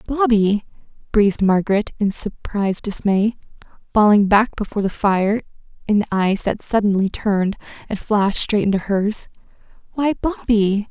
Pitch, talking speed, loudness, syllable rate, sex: 210 Hz, 130 wpm, -19 LUFS, 4.9 syllables/s, female